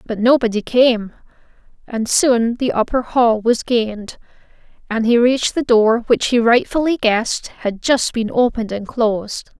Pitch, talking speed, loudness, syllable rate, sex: 235 Hz, 155 wpm, -16 LUFS, 4.5 syllables/s, female